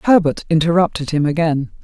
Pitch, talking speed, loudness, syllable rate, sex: 160 Hz, 130 wpm, -17 LUFS, 5.8 syllables/s, female